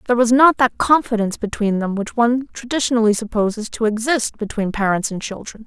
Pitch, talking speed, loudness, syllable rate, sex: 225 Hz, 180 wpm, -18 LUFS, 6.0 syllables/s, female